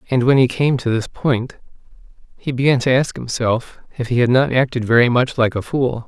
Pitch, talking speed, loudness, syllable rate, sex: 125 Hz, 215 wpm, -17 LUFS, 5.2 syllables/s, male